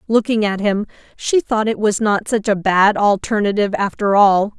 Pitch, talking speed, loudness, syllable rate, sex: 210 Hz, 185 wpm, -16 LUFS, 4.9 syllables/s, female